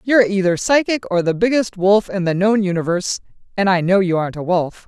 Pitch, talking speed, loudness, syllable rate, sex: 195 Hz, 220 wpm, -17 LUFS, 5.9 syllables/s, female